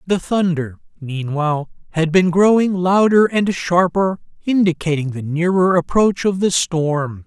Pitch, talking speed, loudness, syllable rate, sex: 175 Hz, 130 wpm, -17 LUFS, 4.2 syllables/s, male